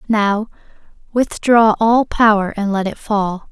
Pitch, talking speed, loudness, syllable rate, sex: 215 Hz, 120 wpm, -16 LUFS, 3.8 syllables/s, female